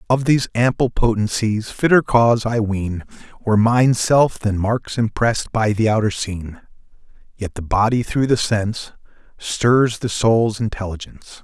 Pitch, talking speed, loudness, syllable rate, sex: 110 Hz, 145 wpm, -18 LUFS, 4.7 syllables/s, male